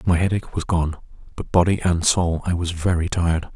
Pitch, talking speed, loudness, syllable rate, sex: 85 Hz, 205 wpm, -21 LUFS, 5.7 syllables/s, male